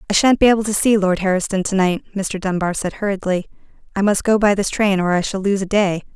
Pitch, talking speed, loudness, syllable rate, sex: 195 Hz, 255 wpm, -18 LUFS, 6.2 syllables/s, female